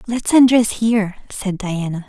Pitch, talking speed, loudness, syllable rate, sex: 210 Hz, 145 wpm, -17 LUFS, 4.5 syllables/s, female